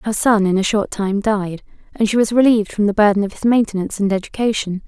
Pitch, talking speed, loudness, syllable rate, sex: 210 Hz, 235 wpm, -17 LUFS, 6.3 syllables/s, female